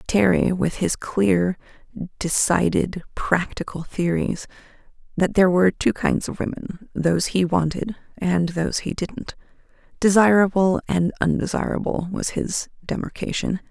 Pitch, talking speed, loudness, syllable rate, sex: 185 Hz, 115 wpm, -22 LUFS, 4.5 syllables/s, female